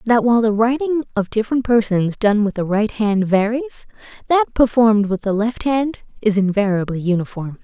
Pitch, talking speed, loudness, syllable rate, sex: 220 Hz, 175 wpm, -18 LUFS, 5.2 syllables/s, female